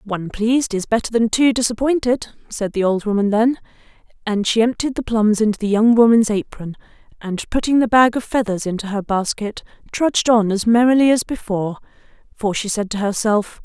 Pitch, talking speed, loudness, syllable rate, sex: 220 Hz, 185 wpm, -18 LUFS, 5.5 syllables/s, female